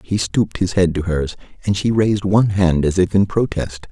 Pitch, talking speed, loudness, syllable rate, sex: 95 Hz, 230 wpm, -18 LUFS, 5.4 syllables/s, male